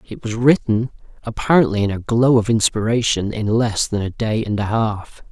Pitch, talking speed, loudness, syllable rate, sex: 110 Hz, 190 wpm, -18 LUFS, 5.0 syllables/s, male